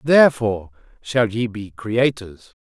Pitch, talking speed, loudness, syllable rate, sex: 115 Hz, 115 wpm, -19 LUFS, 4.2 syllables/s, male